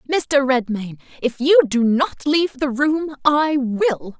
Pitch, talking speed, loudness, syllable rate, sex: 270 Hz, 155 wpm, -18 LUFS, 3.7 syllables/s, female